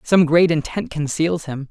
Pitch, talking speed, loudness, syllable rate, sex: 160 Hz, 175 wpm, -19 LUFS, 4.4 syllables/s, male